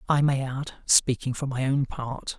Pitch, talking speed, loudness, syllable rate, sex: 135 Hz, 200 wpm, -25 LUFS, 4.2 syllables/s, male